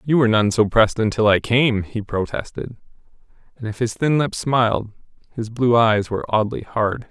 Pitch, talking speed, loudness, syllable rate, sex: 110 Hz, 185 wpm, -19 LUFS, 5.2 syllables/s, male